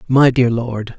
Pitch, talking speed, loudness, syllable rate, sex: 120 Hz, 185 wpm, -15 LUFS, 3.6 syllables/s, male